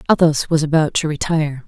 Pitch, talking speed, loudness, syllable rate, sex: 155 Hz, 180 wpm, -17 LUFS, 6.2 syllables/s, female